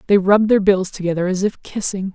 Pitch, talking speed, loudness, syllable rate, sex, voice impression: 195 Hz, 225 wpm, -17 LUFS, 6.1 syllables/s, female, feminine, adult-like, slightly powerful, slightly bright, fluent, slightly raspy, intellectual, calm, friendly, kind, slightly modest